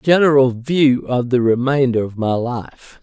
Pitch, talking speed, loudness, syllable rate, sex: 130 Hz, 160 wpm, -16 LUFS, 4.0 syllables/s, male